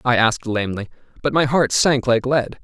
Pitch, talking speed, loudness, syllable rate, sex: 125 Hz, 205 wpm, -19 LUFS, 5.6 syllables/s, male